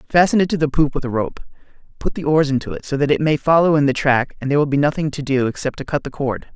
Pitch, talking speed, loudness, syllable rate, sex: 145 Hz, 300 wpm, -18 LUFS, 6.8 syllables/s, male